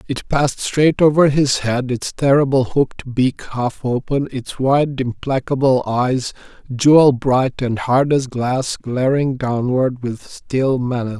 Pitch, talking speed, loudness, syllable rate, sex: 130 Hz, 145 wpm, -17 LUFS, 3.9 syllables/s, male